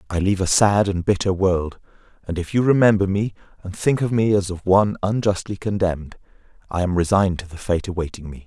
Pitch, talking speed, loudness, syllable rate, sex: 95 Hz, 205 wpm, -20 LUFS, 6.0 syllables/s, male